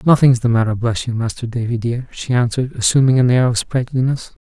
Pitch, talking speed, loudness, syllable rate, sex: 120 Hz, 205 wpm, -17 LUFS, 5.9 syllables/s, male